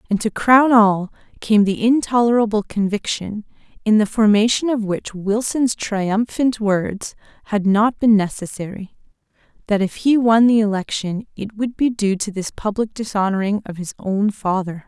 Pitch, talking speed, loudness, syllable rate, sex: 210 Hz, 155 wpm, -18 LUFS, 4.6 syllables/s, female